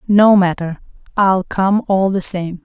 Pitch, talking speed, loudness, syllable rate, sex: 190 Hz, 160 wpm, -15 LUFS, 3.8 syllables/s, female